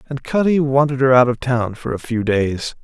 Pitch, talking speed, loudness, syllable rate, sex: 130 Hz, 235 wpm, -17 LUFS, 4.9 syllables/s, male